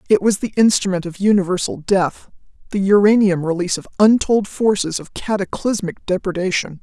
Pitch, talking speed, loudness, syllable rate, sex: 195 Hz, 130 wpm, -18 LUFS, 5.4 syllables/s, female